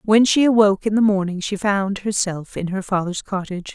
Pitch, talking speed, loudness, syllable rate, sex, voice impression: 200 Hz, 210 wpm, -19 LUFS, 5.4 syllables/s, female, feminine, slightly gender-neutral, very adult-like, very middle-aged, thin, slightly tensed, slightly weak, bright, very soft, clear, fluent, slightly cute, cool, intellectual, refreshing, very sincere, very calm, friendly, very reassuring, slightly unique, very elegant, sweet, slightly lively, very kind, very modest